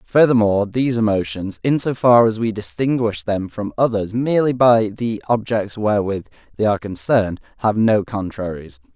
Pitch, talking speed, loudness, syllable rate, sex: 110 Hz, 155 wpm, -18 LUFS, 5.3 syllables/s, male